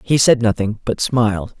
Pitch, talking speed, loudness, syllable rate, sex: 115 Hz, 190 wpm, -17 LUFS, 4.9 syllables/s, female